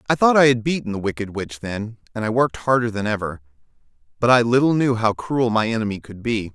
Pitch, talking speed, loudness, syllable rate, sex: 115 Hz, 230 wpm, -20 LUFS, 6.1 syllables/s, male